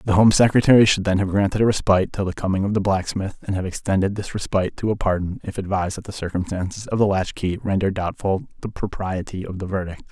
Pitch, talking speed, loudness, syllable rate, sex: 100 Hz, 230 wpm, -21 LUFS, 6.5 syllables/s, male